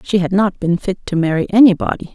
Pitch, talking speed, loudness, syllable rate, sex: 190 Hz, 225 wpm, -15 LUFS, 5.9 syllables/s, female